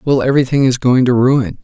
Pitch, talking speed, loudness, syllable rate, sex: 125 Hz, 220 wpm, -13 LUFS, 5.7 syllables/s, male